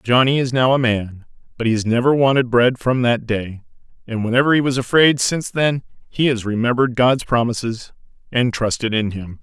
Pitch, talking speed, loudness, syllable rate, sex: 120 Hz, 190 wpm, -18 LUFS, 5.4 syllables/s, male